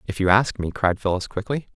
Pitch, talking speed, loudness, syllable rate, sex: 105 Hz, 240 wpm, -22 LUFS, 5.6 syllables/s, male